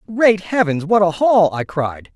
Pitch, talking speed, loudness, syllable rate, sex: 185 Hz, 195 wpm, -16 LUFS, 4.4 syllables/s, male